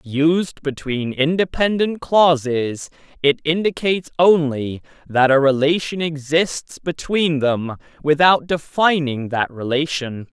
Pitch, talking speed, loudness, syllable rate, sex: 150 Hz, 100 wpm, -18 LUFS, 3.8 syllables/s, male